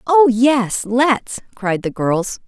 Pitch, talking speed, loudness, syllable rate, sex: 235 Hz, 145 wpm, -17 LUFS, 2.8 syllables/s, female